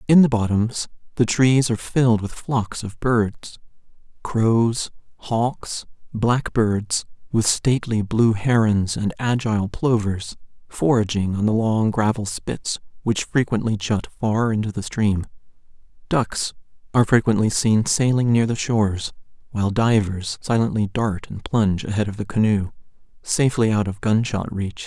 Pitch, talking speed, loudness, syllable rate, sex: 110 Hz, 135 wpm, -21 LUFS, 4.4 syllables/s, male